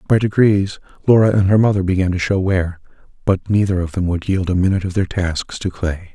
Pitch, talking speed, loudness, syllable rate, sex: 95 Hz, 225 wpm, -17 LUFS, 5.7 syllables/s, male